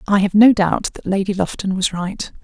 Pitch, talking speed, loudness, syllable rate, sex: 195 Hz, 220 wpm, -17 LUFS, 5.0 syllables/s, female